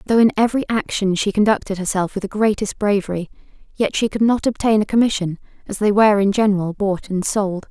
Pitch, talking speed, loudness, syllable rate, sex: 205 Hz, 205 wpm, -18 LUFS, 6.1 syllables/s, female